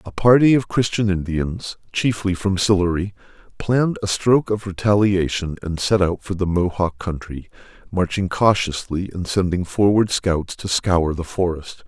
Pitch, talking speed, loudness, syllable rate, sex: 95 Hz, 150 wpm, -20 LUFS, 4.6 syllables/s, male